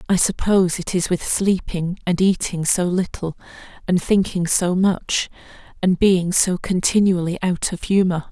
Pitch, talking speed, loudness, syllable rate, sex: 180 Hz, 150 wpm, -19 LUFS, 4.4 syllables/s, female